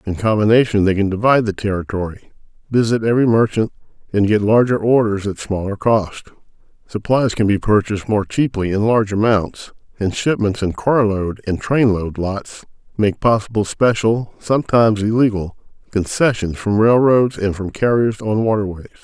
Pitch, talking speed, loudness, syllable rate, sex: 105 Hz, 150 wpm, -17 LUFS, 4.9 syllables/s, male